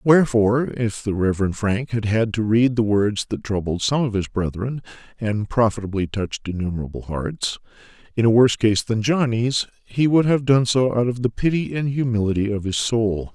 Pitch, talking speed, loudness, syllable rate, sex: 115 Hz, 190 wpm, -21 LUFS, 5.2 syllables/s, male